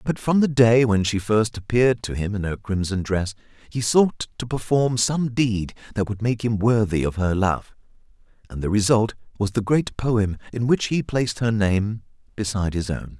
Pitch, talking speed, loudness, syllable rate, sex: 110 Hz, 200 wpm, -22 LUFS, 4.8 syllables/s, male